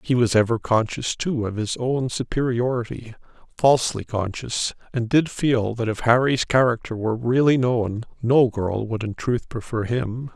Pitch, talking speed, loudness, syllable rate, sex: 120 Hz, 150 wpm, -22 LUFS, 4.6 syllables/s, male